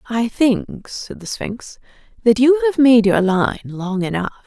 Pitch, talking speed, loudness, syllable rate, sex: 230 Hz, 175 wpm, -17 LUFS, 3.9 syllables/s, female